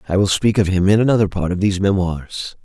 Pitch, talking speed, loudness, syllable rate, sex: 95 Hz, 250 wpm, -17 LUFS, 6.2 syllables/s, male